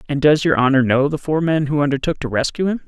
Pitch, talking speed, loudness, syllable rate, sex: 150 Hz, 270 wpm, -17 LUFS, 6.3 syllables/s, male